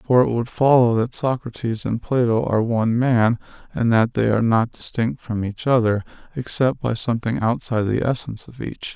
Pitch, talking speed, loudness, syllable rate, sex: 115 Hz, 190 wpm, -20 LUFS, 5.4 syllables/s, male